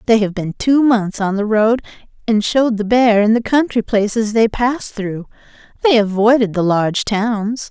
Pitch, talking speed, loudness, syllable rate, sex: 220 Hz, 185 wpm, -15 LUFS, 4.8 syllables/s, female